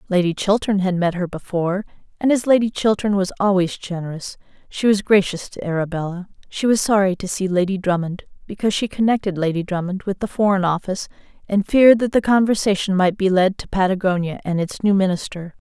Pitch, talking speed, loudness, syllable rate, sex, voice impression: 190 Hz, 185 wpm, -19 LUFS, 6.0 syllables/s, female, very feminine, slightly young, adult-like, thin, slightly relaxed, slightly weak, bright, hard, very clear, very fluent, cute, very intellectual, very refreshing, sincere, very calm, very friendly, very reassuring, slightly unique, very elegant, slightly wild, very sweet, very kind, modest, light